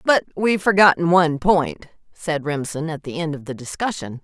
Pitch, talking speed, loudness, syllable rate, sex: 160 Hz, 185 wpm, -20 LUFS, 5.3 syllables/s, female